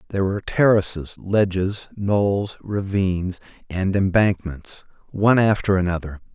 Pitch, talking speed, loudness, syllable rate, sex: 95 Hz, 105 wpm, -21 LUFS, 4.6 syllables/s, male